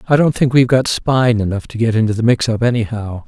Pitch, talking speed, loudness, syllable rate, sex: 115 Hz, 255 wpm, -15 LUFS, 6.5 syllables/s, male